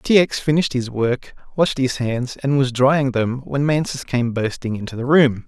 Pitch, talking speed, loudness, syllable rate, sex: 130 Hz, 210 wpm, -19 LUFS, 4.6 syllables/s, male